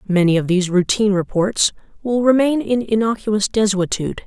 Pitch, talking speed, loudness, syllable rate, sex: 205 Hz, 140 wpm, -17 LUFS, 5.5 syllables/s, female